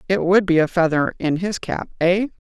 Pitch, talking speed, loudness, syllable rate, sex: 180 Hz, 220 wpm, -19 LUFS, 5.1 syllables/s, female